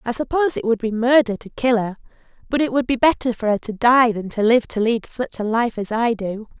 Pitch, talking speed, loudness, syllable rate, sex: 235 Hz, 265 wpm, -19 LUFS, 5.6 syllables/s, female